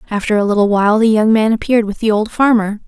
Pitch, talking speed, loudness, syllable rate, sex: 215 Hz, 250 wpm, -14 LUFS, 6.9 syllables/s, female